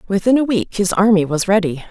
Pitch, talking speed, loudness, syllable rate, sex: 200 Hz, 220 wpm, -16 LUFS, 6.0 syllables/s, female